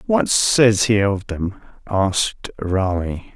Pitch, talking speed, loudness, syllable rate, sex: 105 Hz, 125 wpm, -19 LUFS, 3.1 syllables/s, male